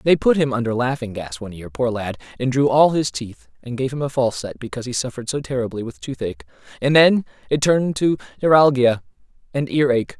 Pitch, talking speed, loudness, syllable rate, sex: 125 Hz, 220 wpm, -20 LUFS, 6.2 syllables/s, male